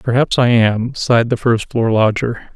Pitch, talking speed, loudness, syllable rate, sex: 115 Hz, 190 wpm, -15 LUFS, 4.6 syllables/s, male